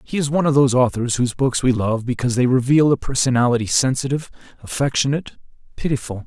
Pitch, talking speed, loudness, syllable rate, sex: 130 Hz, 170 wpm, -19 LUFS, 7.0 syllables/s, male